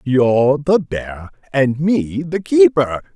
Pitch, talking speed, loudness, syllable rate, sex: 145 Hz, 135 wpm, -16 LUFS, 3.3 syllables/s, male